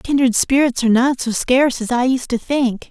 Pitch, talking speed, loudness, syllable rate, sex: 250 Hz, 225 wpm, -16 LUFS, 5.3 syllables/s, female